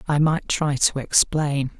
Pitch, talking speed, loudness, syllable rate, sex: 145 Hz, 165 wpm, -21 LUFS, 3.8 syllables/s, male